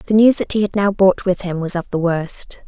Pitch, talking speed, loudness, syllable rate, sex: 190 Hz, 290 wpm, -17 LUFS, 5.3 syllables/s, female